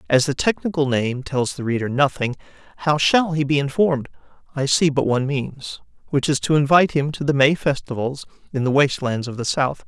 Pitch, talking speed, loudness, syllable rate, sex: 140 Hz, 205 wpm, -20 LUFS, 5.6 syllables/s, male